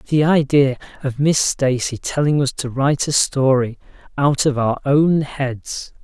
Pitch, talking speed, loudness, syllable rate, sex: 135 Hz, 160 wpm, -18 LUFS, 4.0 syllables/s, male